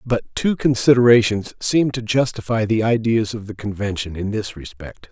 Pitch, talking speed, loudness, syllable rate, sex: 110 Hz, 165 wpm, -19 LUFS, 4.8 syllables/s, male